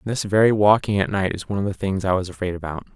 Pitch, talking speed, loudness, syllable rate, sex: 100 Hz, 305 wpm, -21 LUFS, 7.3 syllables/s, male